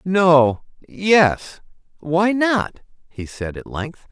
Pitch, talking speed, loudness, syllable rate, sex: 170 Hz, 85 wpm, -18 LUFS, 2.5 syllables/s, male